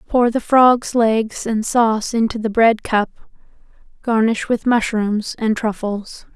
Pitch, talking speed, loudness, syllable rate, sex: 225 Hz, 140 wpm, -17 LUFS, 3.7 syllables/s, female